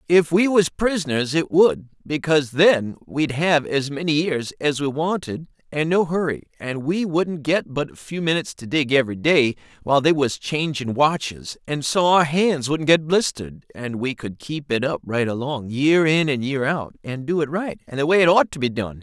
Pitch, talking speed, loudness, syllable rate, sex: 145 Hz, 215 wpm, -21 LUFS, 4.8 syllables/s, male